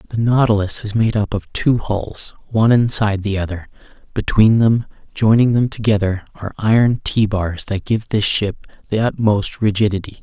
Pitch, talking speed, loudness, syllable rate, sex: 105 Hz, 165 wpm, -17 LUFS, 5.1 syllables/s, male